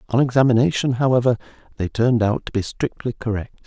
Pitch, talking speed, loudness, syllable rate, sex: 120 Hz, 165 wpm, -20 LUFS, 6.4 syllables/s, male